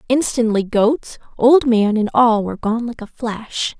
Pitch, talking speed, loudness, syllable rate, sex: 230 Hz, 175 wpm, -17 LUFS, 4.1 syllables/s, female